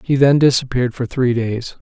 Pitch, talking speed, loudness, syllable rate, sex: 125 Hz, 195 wpm, -17 LUFS, 5.3 syllables/s, male